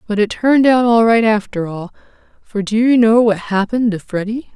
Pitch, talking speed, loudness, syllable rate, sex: 220 Hz, 210 wpm, -14 LUFS, 5.4 syllables/s, female